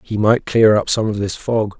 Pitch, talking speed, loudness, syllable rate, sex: 105 Hz, 265 wpm, -16 LUFS, 4.8 syllables/s, male